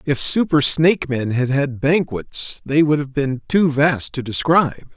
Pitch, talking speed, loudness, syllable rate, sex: 145 Hz, 180 wpm, -18 LUFS, 4.3 syllables/s, male